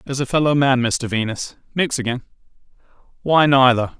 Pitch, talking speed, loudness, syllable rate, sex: 130 Hz, 120 wpm, -18 LUFS, 5.2 syllables/s, male